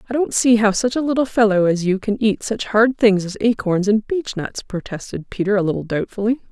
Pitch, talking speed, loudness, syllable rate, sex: 215 Hz, 220 wpm, -19 LUFS, 5.4 syllables/s, female